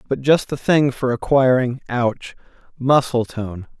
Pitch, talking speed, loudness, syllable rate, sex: 125 Hz, 140 wpm, -19 LUFS, 4.6 syllables/s, male